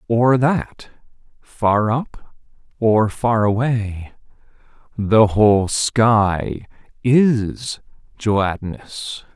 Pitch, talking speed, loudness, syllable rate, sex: 110 Hz, 75 wpm, -18 LUFS, 2.5 syllables/s, male